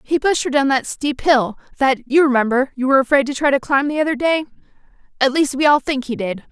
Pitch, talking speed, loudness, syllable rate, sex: 275 Hz, 250 wpm, -17 LUFS, 6.0 syllables/s, female